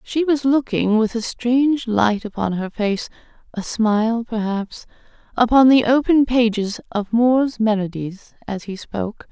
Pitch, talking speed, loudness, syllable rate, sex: 225 Hz, 135 wpm, -19 LUFS, 4.3 syllables/s, female